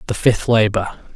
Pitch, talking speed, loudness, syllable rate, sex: 110 Hz, 155 wpm, -17 LUFS, 4.9 syllables/s, male